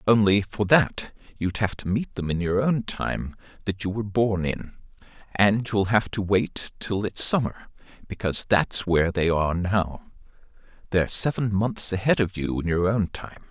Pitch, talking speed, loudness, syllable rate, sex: 100 Hz, 180 wpm, -24 LUFS, 4.8 syllables/s, male